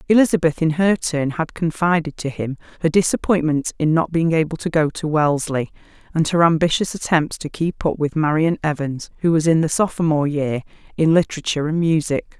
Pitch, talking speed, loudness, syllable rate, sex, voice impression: 160 Hz, 185 wpm, -19 LUFS, 5.7 syllables/s, female, feminine, slightly gender-neutral, adult-like, slightly middle-aged, slightly thin, tensed, slightly powerful, slightly dark, hard, very clear, fluent, very cool, very intellectual, very refreshing, very sincere, calm, friendly, reassuring, unique, very elegant, wild, slightly sweet, slightly strict, slightly modest